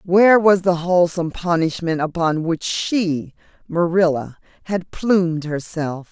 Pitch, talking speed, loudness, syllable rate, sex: 170 Hz, 120 wpm, -19 LUFS, 4.3 syllables/s, female